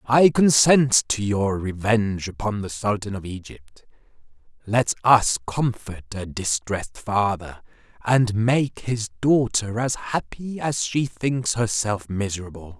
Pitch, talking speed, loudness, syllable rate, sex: 110 Hz, 125 wpm, -22 LUFS, 3.9 syllables/s, male